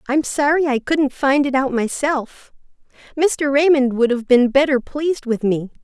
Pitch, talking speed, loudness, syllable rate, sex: 270 Hz, 175 wpm, -18 LUFS, 4.5 syllables/s, female